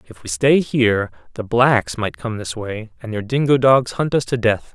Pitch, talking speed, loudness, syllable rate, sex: 115 Hz, 230 wpm, -18 LUFS, 4.7 syllables/s, male